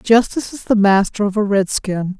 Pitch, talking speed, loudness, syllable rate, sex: 205 Hz, 220 wpm, -17 LUFS, 5.1 syllables/s, female